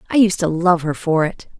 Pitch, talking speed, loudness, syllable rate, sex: 175 Hz, 265 wpm, -18 LUFS, 5.3 syllables/s, female